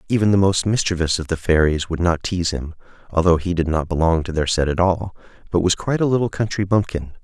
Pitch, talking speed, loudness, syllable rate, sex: 90 Hz, 230 wpm, -20 LUFS, 6.2 syllables/s, male